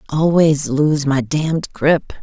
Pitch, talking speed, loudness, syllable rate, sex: 150 Hz, 135 wpm, -16 LUFS, 3.6 syllables/s, female